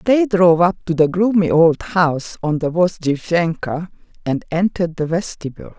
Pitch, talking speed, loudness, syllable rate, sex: 170 Hz, 155 wpm, -17 LUFS, 4.9 syllables/s, female